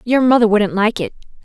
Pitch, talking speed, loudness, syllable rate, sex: 220 Hz, 210 wpm, -14 LUFS, 5.6 syllables/s, female